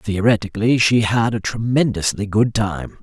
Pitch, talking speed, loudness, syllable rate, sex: 110 Hz, 140 wpm, -18 LUFS, 4.7 syllables/s, male